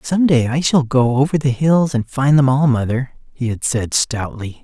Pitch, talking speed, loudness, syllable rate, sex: 130 Hz, 220 wpm, -16 LUFS, 4.6 syllables/s, male